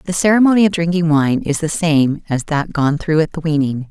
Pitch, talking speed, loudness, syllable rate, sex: 160 Hz, 230 wpm, -16 LUFS, 5.2 syllables/s, female